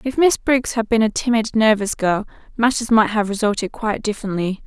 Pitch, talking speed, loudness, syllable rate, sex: 220 Hz, 195 wpm, -19 LUFS, 5.7 syllables/s, female